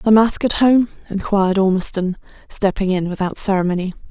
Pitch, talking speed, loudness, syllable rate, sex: 195 Hz, 145 wpm, -17 LUFS, 5.7 syllables/s, female